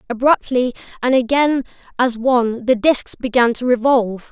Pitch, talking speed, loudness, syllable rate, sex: 245 Hz, 140 wpm, -17 LUFS, 4.9 syllables/s, female